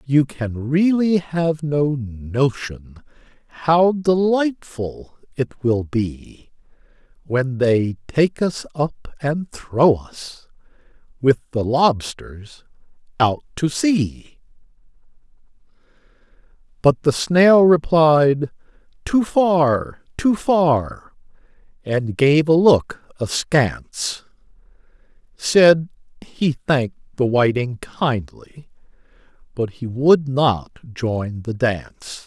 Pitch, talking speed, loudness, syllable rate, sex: 140 Hz, 95 wpm, -19 LUFS, 2.8 syllables/s, male